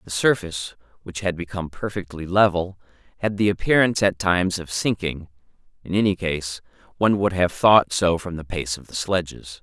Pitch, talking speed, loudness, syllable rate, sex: 90 Hz, 175 wpm, -22 LUFS, 5.4 syllables/s, male